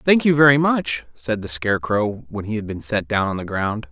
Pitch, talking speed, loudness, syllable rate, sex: 110 Hz, 245 wpm, -20 LUFS, 5.0 syllables/s, male